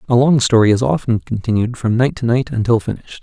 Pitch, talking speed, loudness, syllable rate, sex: 120 Hz, 225 wpm, -16 LUFS, 6.2 syllables/s, male